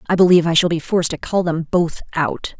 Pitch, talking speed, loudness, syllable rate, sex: 170 Hz, 255 wpm, -17 LUFS, 6.3 syllables/s, female